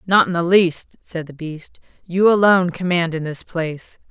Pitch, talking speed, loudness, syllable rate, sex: 175 Hz, 190 wpm, -18 LUFS, 4.7 syllables/s, female